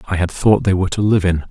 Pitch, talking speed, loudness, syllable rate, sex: 95 Hz, 320 wpm, -16 LUFS, 6.5 syllables/s, male